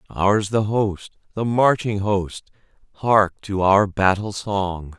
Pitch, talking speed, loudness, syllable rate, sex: 100 Hz, 120 wpm, -20 LUFS, 3.3 syllables/s, male